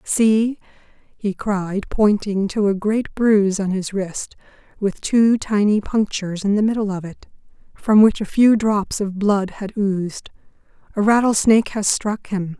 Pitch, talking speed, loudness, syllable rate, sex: 205 Hz, 160 wpm, -19 LUFS, 4.2 syllables/s, female